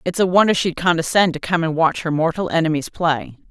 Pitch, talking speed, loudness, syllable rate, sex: 165 Hz, 220 wpm, -18 LUFS, 5.8 syllables/s, female